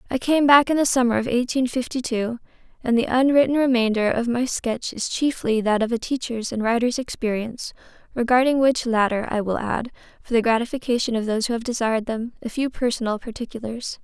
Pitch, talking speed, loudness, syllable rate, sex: 240 Hz, 190 wpm, -22 LUFS, 5.8 syllables/s, female